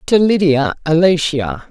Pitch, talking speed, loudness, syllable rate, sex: 160 Hz, 105 wpm, -14 LUFS, 4.1 syllables/s, female